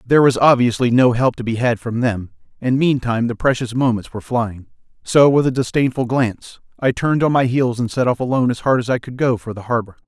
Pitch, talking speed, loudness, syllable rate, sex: 125 Hz, 240 wpm, -17 LUFS, 6.0 syllables/s, male